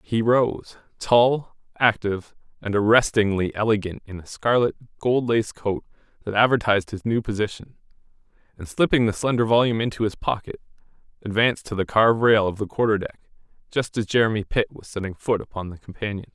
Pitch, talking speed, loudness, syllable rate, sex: 110 Hz, 165 wpm, -22 LUFS, 5.8 syllables/s, male